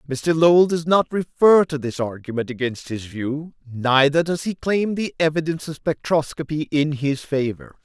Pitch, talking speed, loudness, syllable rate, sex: 150 Hz, 170 wpm, -21 LUFS, 4.7 syllables/s, male